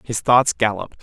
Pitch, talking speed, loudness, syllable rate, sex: 115 Hz, 175 wpm, -18 LUFS, 5.4 syllables/s, male